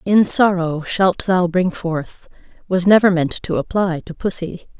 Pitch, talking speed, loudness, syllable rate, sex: 180 Hz, 165 wpm, -17 LUFS, 4.1 syllables/s, female